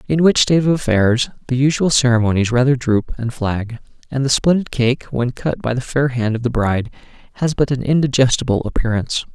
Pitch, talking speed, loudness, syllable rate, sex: 125 Hz, 195 wpm, -17 LUFS, 5.7 syllables/s, male